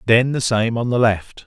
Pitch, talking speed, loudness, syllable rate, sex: 115 Hz, 245 wpm, -18 LUFS, 4.5 syllables/s, male